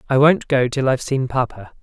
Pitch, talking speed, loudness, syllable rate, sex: 135 Hz, 230 wpm, -18 LUFS, 5.7 syllables/s, male